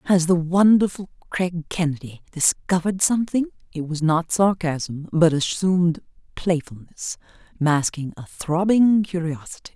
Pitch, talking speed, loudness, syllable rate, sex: 170 Hz, 110 wpm, -21 LUFS, 4.5 syllables/s, female